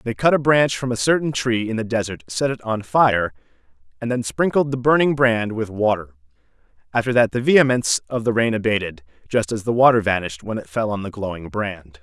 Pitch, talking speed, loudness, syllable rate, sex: 115 Hz, 215 wpm, -20 LUFS, 5.7 syllables/s, male